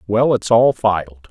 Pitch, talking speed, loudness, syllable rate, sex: 105 Hz, 185 wpm, -16 LUFS, 4.3 syllables/s, male